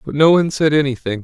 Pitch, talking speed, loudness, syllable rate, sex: 145 Hz, 245 wpm, -15 LUFS, 7.2 syllables/s, male